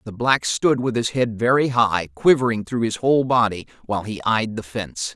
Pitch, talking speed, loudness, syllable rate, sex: 115 Hz, 210 wpm, -20 LUFS, 5.3 syllables/s, male